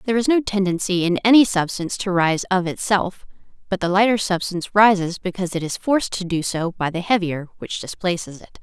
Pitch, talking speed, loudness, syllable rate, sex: 190 Hz, 200 wpm, -20 LUFS, 5.9 syllables/s, female